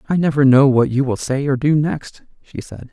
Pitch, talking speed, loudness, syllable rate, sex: 135 Hz, 245 wpm, -16 LUFS, 5.0 syllables/s, male